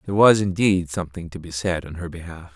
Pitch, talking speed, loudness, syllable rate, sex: 90 Hz, 235 wpm, -21 LUFS, 6.2 syllables/s, male